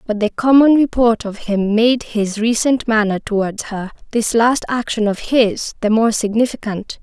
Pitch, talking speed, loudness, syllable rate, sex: 225 Hz, 170 wpm, -16 LUFS, 4.4 syllables/s, female